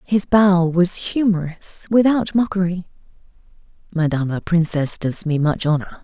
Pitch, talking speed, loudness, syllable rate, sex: 180 Hz, 130 wpm, -18 LUFS, 4.7 syllables/s, female